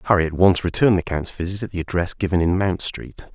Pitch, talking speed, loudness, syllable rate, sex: 90 Hz, 250 wpm, -21 LUFS, 6.5 syllables/s, male